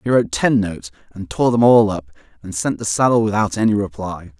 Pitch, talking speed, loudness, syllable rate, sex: 100 Hz, 220 wpm, -17 LUFS, 5.8 syllables/s, male